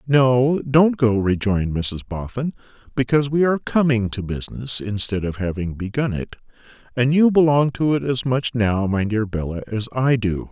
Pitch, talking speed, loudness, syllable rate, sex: 120 Hz, 175 wpm, -20 LUFS, 5.0 syllables/s, male